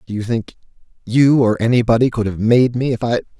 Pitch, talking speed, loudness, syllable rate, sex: 115 Hz, 210 wpm, -16 LUFS, 5.8 syllables/s, male